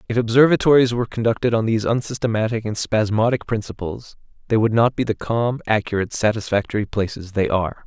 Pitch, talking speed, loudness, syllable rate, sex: 110 Hz, 160 wpm, -20 LUFS, 6.4 syllables/s, male